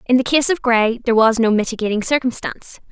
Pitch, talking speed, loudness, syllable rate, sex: 235 Hz, 205 wpm, -16 LUFS, 6.4 syllables/s, female